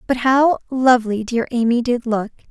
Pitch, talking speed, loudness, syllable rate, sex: 240 Hz, 170 wpm, -17 LUFS, 5.0 syllables/s, female